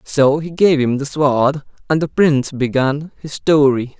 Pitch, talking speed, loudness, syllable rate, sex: 145 Hz, 180 wpm, -16 LUFS, 4.2 syllables/s, male